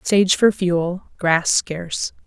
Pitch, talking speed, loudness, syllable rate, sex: 180 Hz, 130 wpm, -19 LUFS, 3.0 syllables/s, female